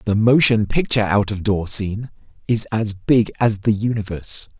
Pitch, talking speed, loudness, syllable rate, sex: 110 Hz, 170 wpm, -19 LUFS, 5.3 syllables/s, male